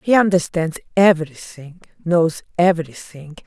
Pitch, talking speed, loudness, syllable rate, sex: 170 Hz, 85 wpm, -17 LUFS, 4.8 syllables/s, female